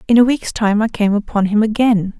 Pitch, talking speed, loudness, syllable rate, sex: 215 Hz, 245 wpm, -15 LUFS, 5.5 syllables/s, female